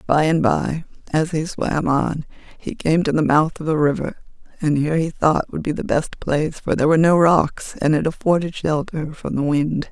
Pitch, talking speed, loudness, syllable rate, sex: 155 Hz, 220 wpm, -20 LUFS, 5.1 syllables/s, female